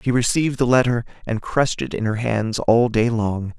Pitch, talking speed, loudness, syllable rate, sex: 115 Hz, 220 wpm, -20 LUFS, 5.3 syllables/s, male